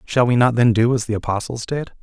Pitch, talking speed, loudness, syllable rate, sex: 120 Hz, 265 wpm, -18 LUFS, 5.8 syllables/s, male